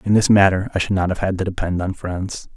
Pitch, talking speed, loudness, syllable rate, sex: 95 Hz, 280 wpm, -19 LUFS, 5.9 syllables/s, male